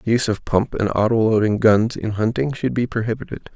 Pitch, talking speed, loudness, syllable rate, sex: 110 Hz, 205 wpm, -19 LUFS, 5.9 syllables/s, male